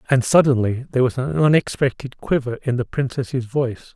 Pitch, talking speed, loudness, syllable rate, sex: 130 Hz, 165 wpm, -20 LUFS, 5.5 syllables/s, male